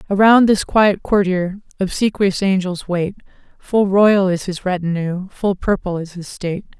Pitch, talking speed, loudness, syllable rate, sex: 190 Hz, 150 wpm, -17 LUFS, 4.5 syllables/s, female